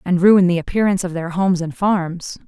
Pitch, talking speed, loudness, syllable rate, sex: 180 Hz, 220 wpm, -17 LUFS, 5.6 syllables/s, female